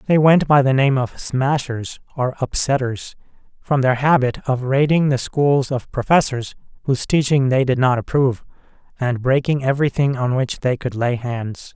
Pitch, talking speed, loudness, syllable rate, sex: 130 Hz, 170 wpm, -18 LUFS, 4.8 syllables/s, male